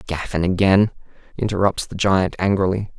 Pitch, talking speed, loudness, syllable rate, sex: 95 Hz, 120 wpm, -19 LUFS, 5.0 syllables/s, male